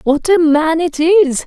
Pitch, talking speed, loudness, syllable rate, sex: 325 Hz, 205 wpm, -12 LUFS, 3.7 syllables/s, female